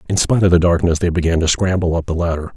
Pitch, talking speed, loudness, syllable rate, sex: 85 Hz, 280 wpm, -16 LUFS, 7.2 syllables/s, male